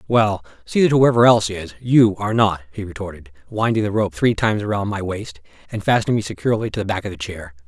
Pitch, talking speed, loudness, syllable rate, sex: 100 Hz, 225 wpm, -19 LUFS, 6.4 syllables/s, male